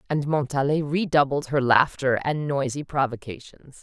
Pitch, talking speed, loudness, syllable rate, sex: 140 Hz, 125 wpm, -23 LUFS, 4.7 syllables/s, female